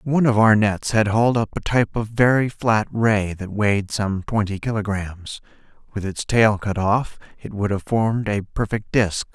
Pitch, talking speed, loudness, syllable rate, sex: 105 Hz, 195 wpm, -20 LUFS, 4.8 syllables/s, male